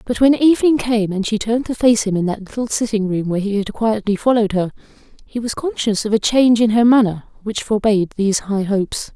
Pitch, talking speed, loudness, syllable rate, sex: 220 Hz, 230 wpm, -17 LUFS, 6.1 syllables/s, female